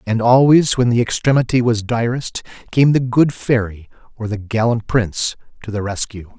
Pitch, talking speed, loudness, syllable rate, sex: 115 Hz, 170 wpm, -17 LUFS, 5.0 syllables/s, male